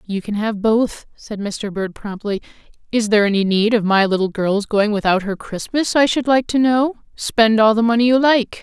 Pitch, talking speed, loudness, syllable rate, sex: 220 Hz, 215 wpm, -17 LUFS, 4.9 syllables/s, female